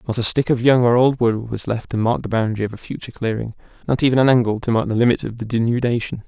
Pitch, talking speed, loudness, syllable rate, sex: 120 Hz, 275 wpm, -19 LUFS, 6.9 syllables/s, male